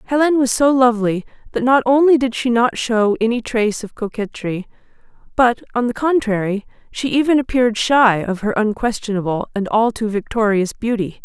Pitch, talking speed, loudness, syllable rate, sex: 230 Hz, 165 wpm, -17 LUFS, 5.4 syllables/s, female